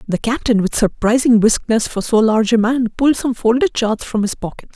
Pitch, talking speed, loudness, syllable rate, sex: 230 Hz, 215 wpm, -16 LUFS, 5.6 syllables/s, female